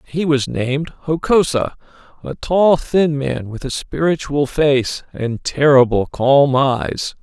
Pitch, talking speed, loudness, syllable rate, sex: 140 Hz, 135 wpm, -17 LUFS, 3.6 syllables/s, male